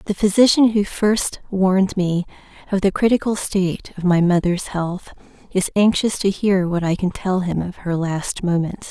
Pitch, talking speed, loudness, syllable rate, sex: 190 Hz, 180 wpm, -19 LUFS, 4.7 syllables/s, female